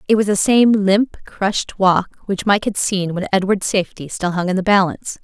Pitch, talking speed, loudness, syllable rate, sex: 195 Hz, 220 wpm, -17 LUFS, 5.3 syllables/s, female